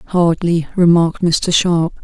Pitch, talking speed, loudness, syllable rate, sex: 170 Hz, 120 wpm, -14 LUFS, 3.8 syllables/s, female